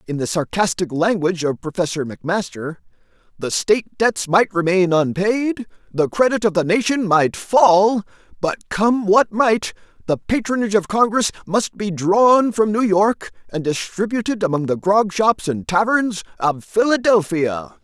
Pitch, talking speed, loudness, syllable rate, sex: 195 Hz, 150 wpm, -18 LUFS, 4.5 syllables/s, male